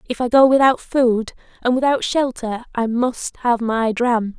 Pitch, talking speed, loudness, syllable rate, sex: 240 Hz, 180 wpm, -18 LUFS, 4.1 syllables/s, female